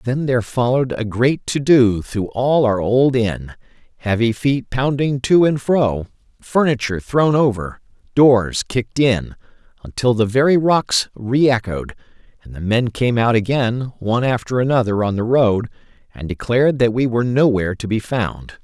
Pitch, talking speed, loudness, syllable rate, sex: 120 Hz, 165 wpm, -17 LUFS, 4.6 syllables/s, male